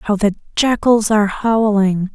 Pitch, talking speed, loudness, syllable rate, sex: 210 Hz, 140 wpm, -15 LUFS, 4.3 syllables/s, female